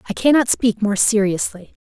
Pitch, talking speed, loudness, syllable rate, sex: 220 Hz, 165 wpm, -17 LUFS, 5.2 syllables/s, female